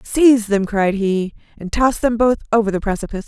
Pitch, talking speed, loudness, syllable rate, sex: 215 Hz, 200 wpm, -17 LUFS, 5.7 syllables/s, female